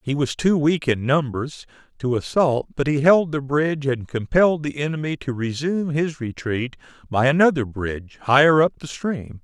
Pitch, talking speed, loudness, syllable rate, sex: 140 Hz, 180 wpm, -21 LUFS, 5.0 syllables/s, male